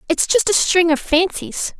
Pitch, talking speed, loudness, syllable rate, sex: 360 Hz, 200 wpm, -16 LUFS, 4.4 syllables/s, female